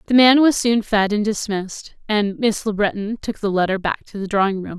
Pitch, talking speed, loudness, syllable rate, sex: 210 Hz, 240 wpm, -19 LUFS, 5.5 syllables/s, female